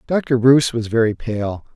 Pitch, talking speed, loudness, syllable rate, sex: 120 Hz, 170 wpm, -17 LUFS, 4.6 syllables/s, male